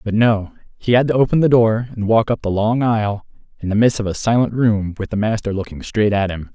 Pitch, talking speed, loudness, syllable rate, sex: 110 Hz, 255 wpm, -17 LUFS, 5.7 syllables/s, male